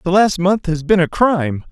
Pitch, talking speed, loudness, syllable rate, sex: 175 Hz, 245 wpm, -16 LUFS, 5.1 syllables/s, male